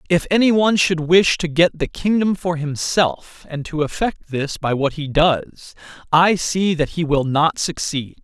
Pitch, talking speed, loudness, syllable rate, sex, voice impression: 165 Hz, 190 wpm, -18 LUFS, 4.2 syllables/s, male, masculine, slightly adult-like, tensed, clear, intellectual, reassuring